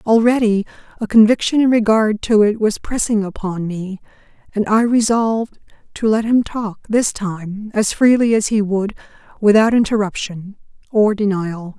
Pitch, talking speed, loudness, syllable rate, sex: 215 Hz, 150 wpm, -17 LUFS, 4.6 syllables/s, female